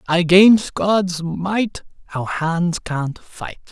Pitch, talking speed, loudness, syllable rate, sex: 180 Hz, 115 wpm, -18 LUFS, 2.6 syllables/s, male